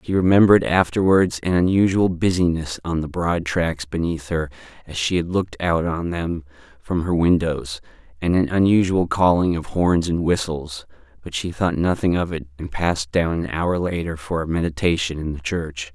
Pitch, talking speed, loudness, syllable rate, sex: 85 Hz, 185 wpm, -21 LUFS, 4.9 syllables/s, male